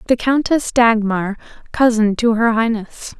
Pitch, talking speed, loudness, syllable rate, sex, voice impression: 230 Hz, 130 wpm, -16 LUFS, 4.2 syllables/s, female, feminine, adult-like, slightly relaxed, slightly bright, soft, slightly muffled, raspy, intellectual, calm, reassuring, elegant, kind, slightly modest